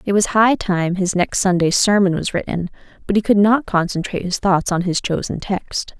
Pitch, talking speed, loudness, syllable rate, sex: 190 Hz, 210 wpm, -18 LUFS, 5.1 syllables/s, female